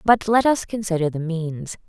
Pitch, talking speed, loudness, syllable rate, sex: 190 Hz, 190 wpm, -21 LUFS, 4.7 syllables/s, female